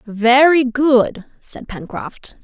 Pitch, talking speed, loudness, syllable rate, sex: 250 Hz, 100 wpm, -14 LUFS, 2.7 syllables/s, female